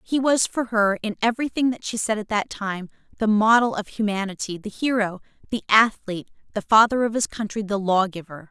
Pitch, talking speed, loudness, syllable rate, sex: 210 Hz, 200 wpm, -22 LUFS, 5.6 syllables/s, female